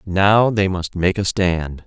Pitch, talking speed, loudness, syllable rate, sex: 95 Hz, 195 wpm, -18 LUFS, 3.4 syllables/s, male